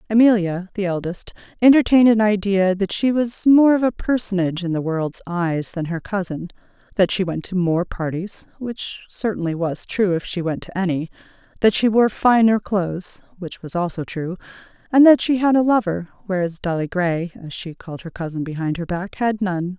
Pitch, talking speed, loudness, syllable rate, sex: 190 Hz, 180 wpm, -20 LUFS, 5.1 syllables/s, female